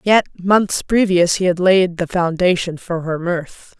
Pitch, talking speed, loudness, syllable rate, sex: 180 Hz, 175 wpm, -17 LUFS, 3.8 syllables/s, female